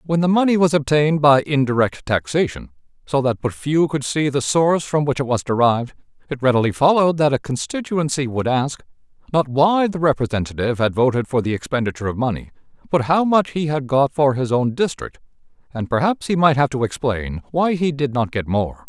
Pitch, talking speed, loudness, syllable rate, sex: 140 Hz, 200 wpm, -19 LUFS, 5.7 syllables/s, male